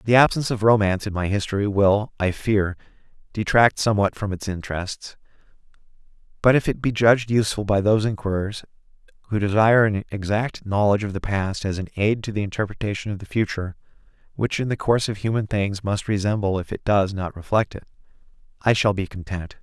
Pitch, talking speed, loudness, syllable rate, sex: 105 Hz, 185 wpm, -22 LUFS, 6.0 syllables/s, male